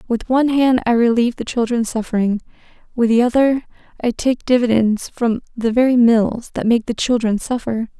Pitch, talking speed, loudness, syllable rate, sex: 235 Hz, 175 wpm, -17 LUFS, 5.3 syllables/s, female